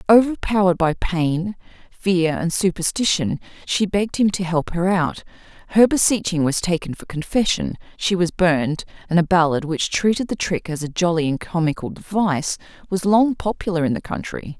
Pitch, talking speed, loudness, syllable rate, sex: 180 Hz, 170 wpm, -20 LUFS, 5.2 syllables/s, female